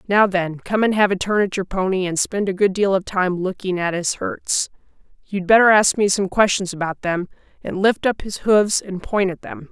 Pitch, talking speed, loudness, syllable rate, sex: 195 Hz, 235 wpm, -19 LUFS, 4.9 syllables/s, female